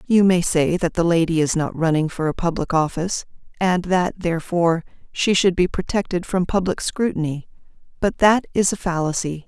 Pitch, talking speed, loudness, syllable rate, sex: 175 Hz, 175 wpm, -20 LUFS, 5.3 syllables/s, female